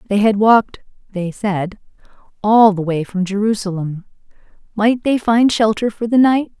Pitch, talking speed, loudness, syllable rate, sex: 210 Hz, 155 wpm, -16 LUFS, 4.9 syllables/s, female